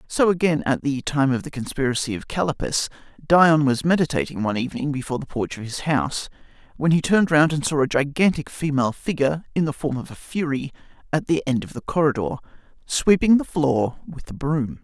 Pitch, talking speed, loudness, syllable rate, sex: 145 Hz, 200 wpm, -22 LUFS, 5.9 syllables/s, male